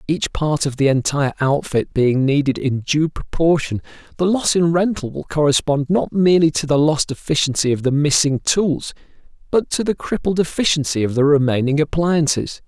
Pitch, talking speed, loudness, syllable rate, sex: 150 Hz, 170 wpm, -18 LUFS, 5.2 syllables/s, male